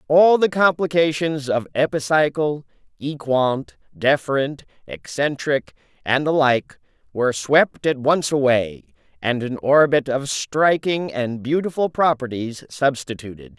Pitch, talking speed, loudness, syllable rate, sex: 140 Hz, 110 wpm, -20 LUFS, 4.1 syllables/s, male